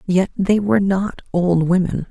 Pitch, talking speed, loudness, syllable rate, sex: 180 Hz, 170 wpm, -18 LUFS, 4.4 syllables/s, female